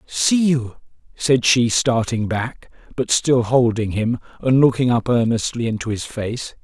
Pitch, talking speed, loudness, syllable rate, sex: 120 Hz, 155 wpm, -19 LUFS, 4.1 syllables/s, male